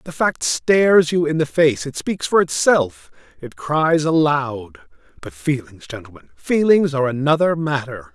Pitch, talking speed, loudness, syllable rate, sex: 145 Hz, 155 wpm, -18 LUFS, 4.4 syllables/s, male